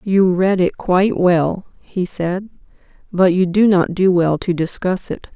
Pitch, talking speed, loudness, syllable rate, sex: 185 Hz, 180 wpm, -16 LUFS, 4.0 syllables/s, female